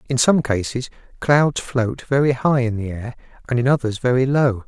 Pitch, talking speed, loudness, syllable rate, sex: 125 Hz, 190 wpm, -19 LUFS, 5.0 syllables/s, male